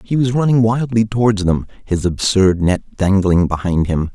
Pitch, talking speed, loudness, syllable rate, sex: 100 Hz, 175 wpm, -16 LUFS, 4.8 syllables/s, male